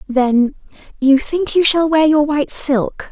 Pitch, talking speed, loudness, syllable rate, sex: 290 Hz, 175 wpm, -15 LUFS, 4.0 syllables/s, female